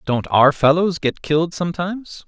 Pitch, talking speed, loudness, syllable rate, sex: 160 Hz, 160 wpm, -18 LUFS, 5.1 syllables/s, male